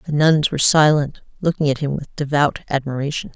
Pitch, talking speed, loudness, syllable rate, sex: 145 Hz, 180 wpm, -18 LUFS, 5.8 syllables/s, female